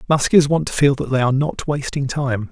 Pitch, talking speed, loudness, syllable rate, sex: 140 Hz, 240 wpm, -18 LUFS, 6.1 syllables/s, male